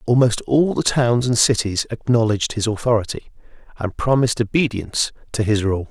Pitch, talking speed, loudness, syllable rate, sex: 115 Hz, 150 wpm, -19 LUFS, 5.5 syllables/s, male